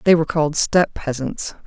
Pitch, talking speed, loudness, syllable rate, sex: 160 Hz, 180 wpm, -19 LUFS, 6.2 syllables/s, female